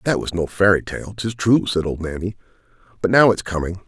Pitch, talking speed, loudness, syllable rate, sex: 95 Hz, 215 wpm, -20 LUFS, 5.6 syllables/s, male